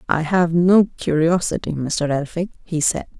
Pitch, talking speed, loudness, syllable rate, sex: 165 Hz, 150 wpm, -19 LUFS, 4.5 syllables/s, female